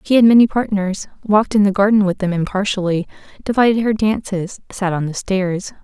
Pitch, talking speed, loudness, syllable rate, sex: 200 Hz, 185 wpm, -17 LUFS, 5.5 syllables/s, female